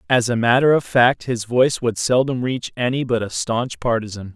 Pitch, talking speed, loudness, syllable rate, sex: 120 Hz, 205 wpm, -19 LUFS, 5.1 syllables/s, male